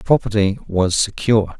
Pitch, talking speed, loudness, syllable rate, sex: 105 Hz, 115 wpm, -18 LUFS, 5.0 syllables/s, male